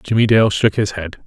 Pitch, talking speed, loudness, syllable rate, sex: 105 Hz, 235 wpm, -15 LUFS, 5.5 syllables/s, male